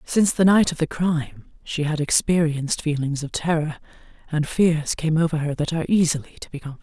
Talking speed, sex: 200 wpm, female